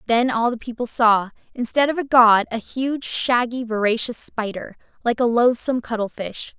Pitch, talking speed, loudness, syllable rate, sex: 235 Hz, 165 wpm, -20 LUFS, 4.8 syllables/s, female